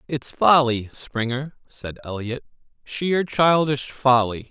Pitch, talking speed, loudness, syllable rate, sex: 130 Hz, 105 wpm, -21 LUFS, 3.5 syllables/s, male